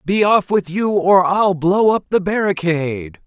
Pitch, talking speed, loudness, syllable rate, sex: 185 Hz, 185 wpm, -16 LUFS, 4.2 syllables/s, male